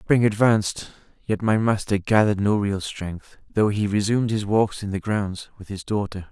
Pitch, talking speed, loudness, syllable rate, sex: 105 Hz, 190 wpm, -22 LUFS, 4.8 syllables/s, male